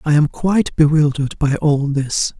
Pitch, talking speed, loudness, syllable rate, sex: 150 Hz, 175 wpm, -16 LUFS, 4.9 syllables/s, male